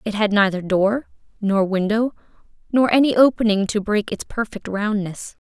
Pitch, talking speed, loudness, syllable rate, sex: 210 Hz, 155 wpm, -20 LUFS, 4.8 syllables/s, female